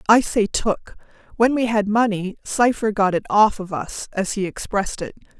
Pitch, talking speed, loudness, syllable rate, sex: 210 Hz, 190 wpm, -20 LUFS, 5.0 syllables/s, female